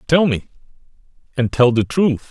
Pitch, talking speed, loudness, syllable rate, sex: 130 Hz, 155 wpm, -17 LUFS, 4.9 syllables/s, male